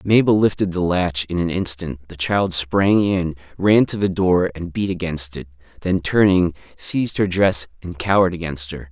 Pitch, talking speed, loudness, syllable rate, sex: 90 Hz, 190 wpm, -19 LUFS, 4.7 syllables/s, male